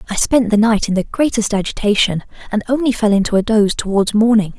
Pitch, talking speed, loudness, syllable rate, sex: 215 Hz, 210 wpm, -15 LUFS, 6.2 syllables/s, female